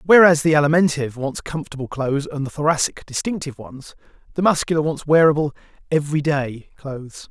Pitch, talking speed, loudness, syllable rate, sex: 150 Hz, 140 wpm, -19 LUFS, 6.2 syllables/s, male